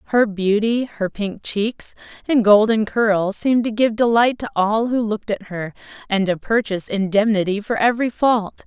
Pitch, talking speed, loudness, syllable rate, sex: 215 Hz, 175 wpm, -19 LUFS, 4.8 syllables/s, female